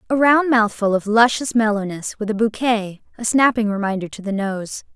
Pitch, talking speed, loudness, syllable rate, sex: 220 Hz, 170 wpm, -19 LUFS, 5.2 syllables/s, female